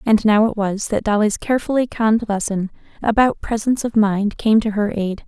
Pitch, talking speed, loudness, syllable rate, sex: 215 Hz, 195 wpm, -18 LUFS, 5.5 syllables/s, female